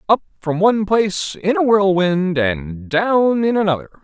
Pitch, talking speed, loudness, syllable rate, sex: 185 Hz, 165 wpm, -17 LUFS, 4.5 syllables/s, male